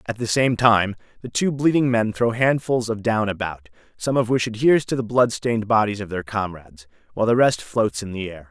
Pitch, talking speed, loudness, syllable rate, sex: 110 Hz, 225 wpm, -21 LUFS, 5.5 syllables/s, male